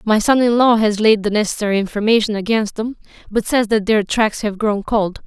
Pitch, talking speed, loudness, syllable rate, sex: 215 Hz, 215 wpm, -17 LUFS, 5.4 syllables/s, female